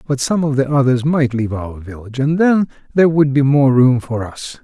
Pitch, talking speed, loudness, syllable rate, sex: 135 Hz, 235 wpm, -15 LUFS, 5.4 syllables/s, male